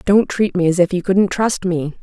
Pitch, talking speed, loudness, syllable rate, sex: 185 Hz, 265 wpm, -17 LUFS, 4.7 syllables/s, female